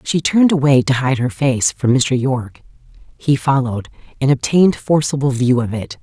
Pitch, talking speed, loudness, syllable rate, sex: 135 Hz, 180 wpm, -16 LUFS, 5.3 syllables/s, female